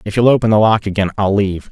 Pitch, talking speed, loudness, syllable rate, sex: 105 Hz, 280 wpm, -14 LUFS, 6.9 syllables/s, male